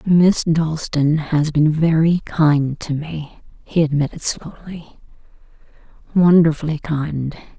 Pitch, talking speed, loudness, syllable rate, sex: 155 Hz, 105 wpm, -18 LUFS, 3.6 syllables/s, female